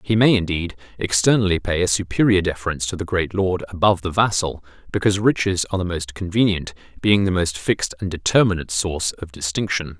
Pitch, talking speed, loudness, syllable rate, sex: 90 Hz, 180 wpm, -20 LUFS, 6.2 syllables/s, male